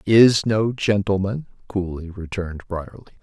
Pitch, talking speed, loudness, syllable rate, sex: 100 Hz, 110 wpm, -21 LUFS, 4.7 syllables/s, male